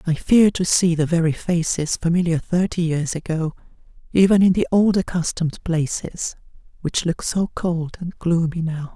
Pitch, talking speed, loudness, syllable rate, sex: 170 Hz, 160 wpm, -20 LUFS, 4.7 syllables/s, female